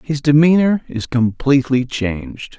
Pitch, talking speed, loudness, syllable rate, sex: 135 Hz, 115 wpm, -16 LUFS, 4.5 syllables/s, male